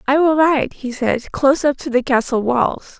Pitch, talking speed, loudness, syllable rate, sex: 270 Hz, 220 wpm, -17 LUFS, 4.6 syllables/s, female